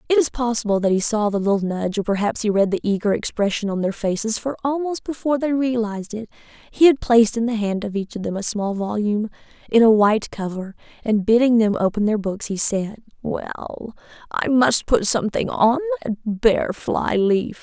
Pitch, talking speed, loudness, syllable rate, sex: 220 Hz, 205 wpm, -20 LUFS, 5.4 syllables/s, female